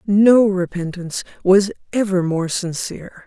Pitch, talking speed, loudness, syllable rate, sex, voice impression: 190 Hz, 110 wpm, -18 LUFS, 4.4 syllables/s, female, feminine, adult-like, intellectual, slightly elegant, slightly sweet